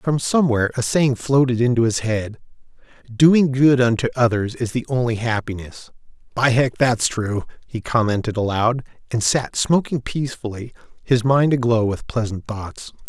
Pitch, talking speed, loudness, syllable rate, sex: 120 Hz, 150 wpm, -19 LUFS, 4.8 syllables/s, male